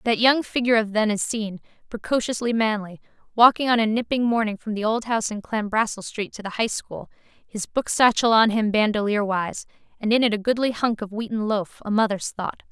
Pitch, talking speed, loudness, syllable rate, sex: 220 Hz, 200 wpm, -22 LUFS, 5.7 syllables/s, female